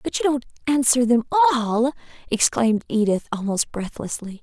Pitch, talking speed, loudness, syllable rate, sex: 240 Hz, 135 wpm, -21 LUFS, 5.0 syllables/s, female